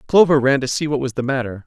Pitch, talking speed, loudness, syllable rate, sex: 135 Hz, 290 wpm, -18 LUFS, 6.6 syllables/s, male